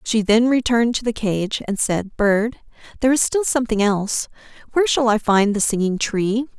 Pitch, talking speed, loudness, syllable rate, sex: 225 Hz, 190 wpm, -19 LUFS, 5.3 syllables/s, female